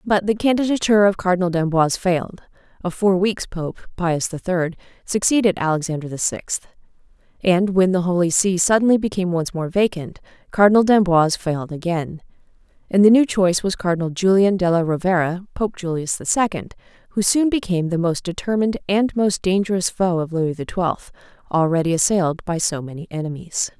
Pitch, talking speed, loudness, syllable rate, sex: 185 Hz, 165 wpm, -19 LUFS, 5.6 syllables/s, female